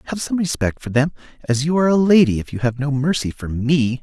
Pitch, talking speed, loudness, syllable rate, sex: 140 Hz, 255 wpm, -19 LUFS, 6.0 syllables/s, male